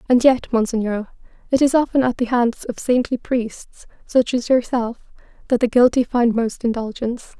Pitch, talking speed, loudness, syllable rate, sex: 240 Hz, 170 wpm, -19 LUFS, 5.0 syllables/s, female